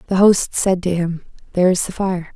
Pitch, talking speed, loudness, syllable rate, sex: 180 Hz, 230 wpm, -18 LUFS, 5.4 syllables/s, female